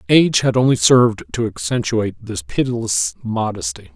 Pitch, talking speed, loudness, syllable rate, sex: 110 Hz, 135 wpm, -18 LUFS, 5.4 syllables/s, male